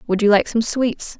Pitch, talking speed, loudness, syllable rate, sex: 220 Hz, 250 wpm, -18 LUFS, 4.9 syllables/s, female